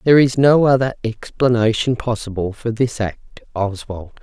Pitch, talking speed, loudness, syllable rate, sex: 115 Hz, 140 wpm, -18 LUFS, 4.8 syllables/s, female